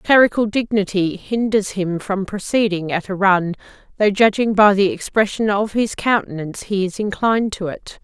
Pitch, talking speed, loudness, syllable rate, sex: 200 Hz, 165 wpm, -18 LUFS, 4.9 syllables/s, female